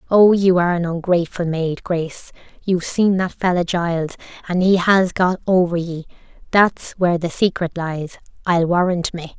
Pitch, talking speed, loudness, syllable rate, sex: 175 Hz, 165 wpm, -18 LUFS, 5.0 syllables/s, female